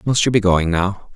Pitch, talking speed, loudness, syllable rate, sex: 100 Hz, 260 wpm, -17 LUFS, 5.0 syllables/s, male